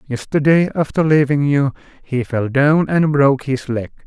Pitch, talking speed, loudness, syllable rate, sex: 140 Hz, 160 wpm, -16 LUFS, 4.6 syllables/s, male